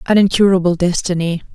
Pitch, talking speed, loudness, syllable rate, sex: 180 Hz, 115 wpm, -15 LUFS, 6.0 syllables/s, female